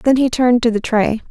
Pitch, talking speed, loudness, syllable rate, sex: 240 Hz, 275 wpm, -15 LUFS, 6.3 syllables/s, female